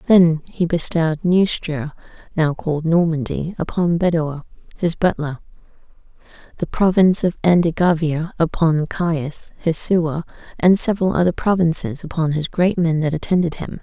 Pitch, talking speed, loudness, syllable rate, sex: 165 Hz, 130 wpm, -19 LUFS, 4.9 syllables/s, female